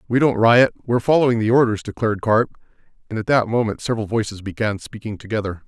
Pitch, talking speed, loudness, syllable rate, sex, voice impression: 110 Hz, 190 wpm, -19 LUFS, 6.6 syllables/s, male, masculine, adult-like, slightly relaxed, powerful, muffled, slightly raspy, cool, intellectual, sincere, slightly mature, reassuring, wild, lively, slightly strict